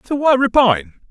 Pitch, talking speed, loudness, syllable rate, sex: 220 Hz, 165 wpm, -15 LUFS, 6.8 syllables/s, male